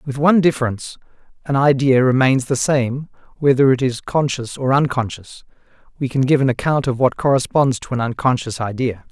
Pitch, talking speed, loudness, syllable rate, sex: 130 Hz, 170 wpm, -17 LUFS, 5.4 syllables/s, male